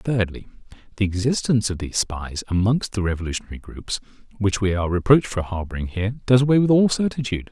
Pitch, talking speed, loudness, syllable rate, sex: 110 Hz, 175 wpm, -22 LUFS, 6.6 syllables/s, male